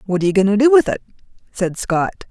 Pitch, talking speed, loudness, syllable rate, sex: 205 Hz, 260 wpm, -16 LUFS, 6.6 syllables/s, female